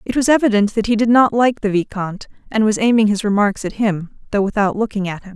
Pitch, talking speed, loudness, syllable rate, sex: 210 Hz, 245 wpm, -17 LUFS, 6.2 syllables/s, female